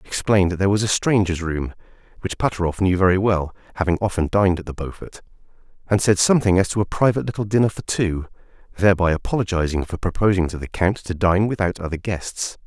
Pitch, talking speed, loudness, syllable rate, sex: 95 Hz, 190 wpm, -20 LUFS, 6.6 syllables/s, male